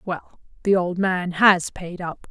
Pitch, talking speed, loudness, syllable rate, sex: 180 Hz, 185 wpm, -21 LUFS, 3.6 syllables/s, female